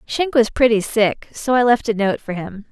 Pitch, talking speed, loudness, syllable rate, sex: 225 Hz, 245 wpm, -18 LUFS, 4.7 syllables/s, female